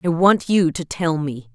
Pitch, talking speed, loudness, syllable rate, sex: 165 Hz, 235 wpm, -19 LUFS, 4.3 syllables/s, female